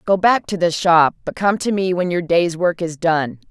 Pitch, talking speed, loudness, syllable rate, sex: 175 Hz, 240 wpm, -18 LUFS, 4.6 syllables/s, female